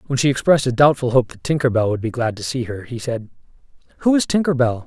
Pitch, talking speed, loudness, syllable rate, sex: 130 Hz, 260 wpm, -19 LUFS, 6.6 syllables/s, male